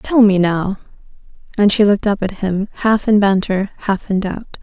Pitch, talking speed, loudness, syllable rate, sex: 200 Hz, 195 wpm, -16 LUFS, 4.9 syllables/s, female